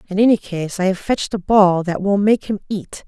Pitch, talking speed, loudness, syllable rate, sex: 195 Hz, 255 wpm, -18 LUFS, 5.3 syllables/s, female